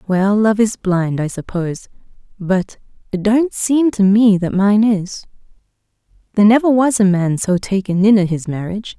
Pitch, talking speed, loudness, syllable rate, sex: 200 Hz, 175 wpm, -15 LUFS, 4.8 syllables/s, female